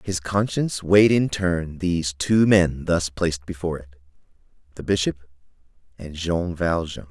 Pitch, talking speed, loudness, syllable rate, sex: 85 Hz, 135 wpm, -22 LUFS, 4.7 syllables/s, male